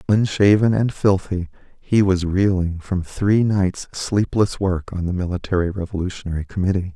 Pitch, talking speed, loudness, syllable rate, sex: 95 Hz, 140 wpm, -20 LUFS, 4.8 syllables/s, male